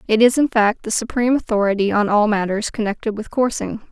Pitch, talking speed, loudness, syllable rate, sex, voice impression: 220 Hz, 200 wpm, -18 LUFS, 5.9 syllables/s, female, feminine, slightly adult-like, clear, slightly cute, slightly refreshing, friendly